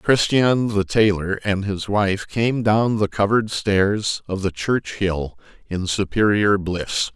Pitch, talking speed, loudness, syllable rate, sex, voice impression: 100 Hz, 150 wpm, -20 LUFS, 3.6 syllables/s, male, masculine, middle-aged, thick, tensed, slightly hard, clear, cool, sincere, slightly mature, slightly friendly, reassuring, wild, lively, slightly strict